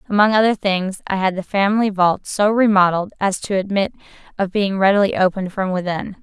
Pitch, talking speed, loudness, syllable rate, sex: 195 Hz, 185 wpm, -18 LUFS, 5.9 syllables/s, female